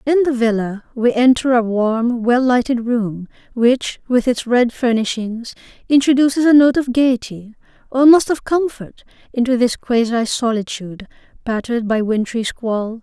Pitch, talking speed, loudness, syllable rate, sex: 240 Hz, 145 wpm, -16 LUFS, 4.8 syllables/s, female